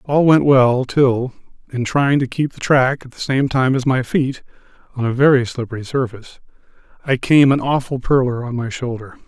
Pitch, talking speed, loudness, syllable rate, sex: 130 Hz, 195 wpm, -17 LUFS, 5.1 syllables/s, male